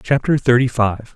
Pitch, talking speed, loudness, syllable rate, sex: 125 Hz, 155 wpm, -16 LUFS, 4.6 syllables/s, male